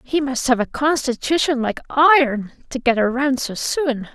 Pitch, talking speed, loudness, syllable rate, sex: 265 Hz, 175 wpm, -19 LUFS, 4.6 syllables/s, female